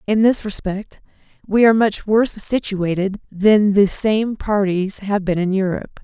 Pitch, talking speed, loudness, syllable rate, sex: 200 Hz, 160 wpm, -18 LUFS, 4.5 syllables/s, female